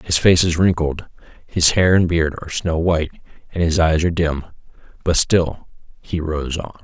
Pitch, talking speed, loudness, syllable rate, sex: 80 Hz, 185 wpm, -18 LUFS, 4.8 syllables/s, male